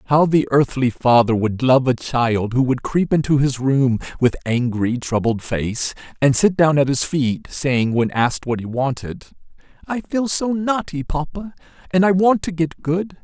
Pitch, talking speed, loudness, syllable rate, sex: 140 Hz, 185 wpm, -19 LUFS, 4.4 syllables/s, male